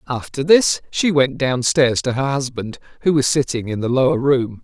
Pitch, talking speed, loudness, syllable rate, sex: 135 Hz, 195 wpm, -18 LUFS, 4.8 syllables/s, male